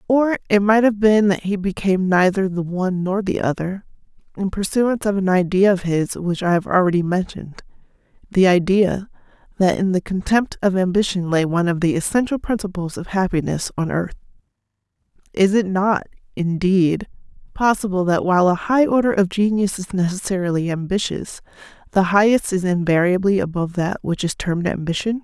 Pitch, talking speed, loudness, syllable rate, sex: 190 Hz, 160 wpm, -19 LUFS, 5.5 syllables/s, female